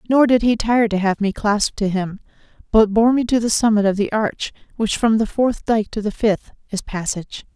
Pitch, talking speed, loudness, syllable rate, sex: 215 Hz, 230 wpm, -19 LUFS, 5.2 syllables/s, female